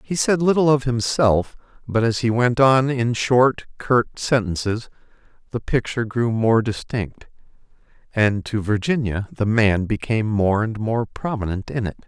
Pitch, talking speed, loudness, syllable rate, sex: 115 Hz, 155 wpm, -20 LUFS, 4.4 syllables/s, male